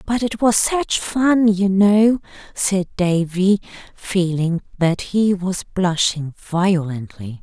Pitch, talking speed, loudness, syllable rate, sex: 190 Hz, 120 wpm, -18 LUFS, 3.2 syllables/s, female